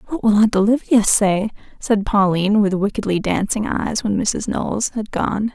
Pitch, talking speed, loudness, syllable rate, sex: 210 Hz, 175 wpm, -18 LUFS, 4.7 syllables/s, female